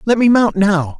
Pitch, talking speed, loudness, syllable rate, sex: 205 Hz, 240 wpm, -13 LUFS, 4.5 syllables/s, male